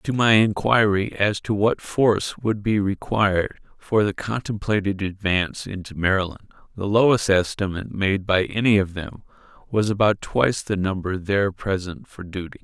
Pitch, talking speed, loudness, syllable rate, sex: 100 Hz, 155 wpm, -22 LUFS, 4.9 syllables/s, male